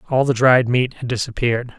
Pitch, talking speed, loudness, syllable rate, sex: 125 Hz, 200 wpm, -18 LUFS, 6.0 syllables/s, male